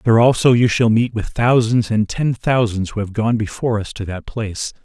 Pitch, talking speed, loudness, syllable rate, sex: 110 Hz, 225 wpm, -17 LUFS, 5.3 syllables/s, male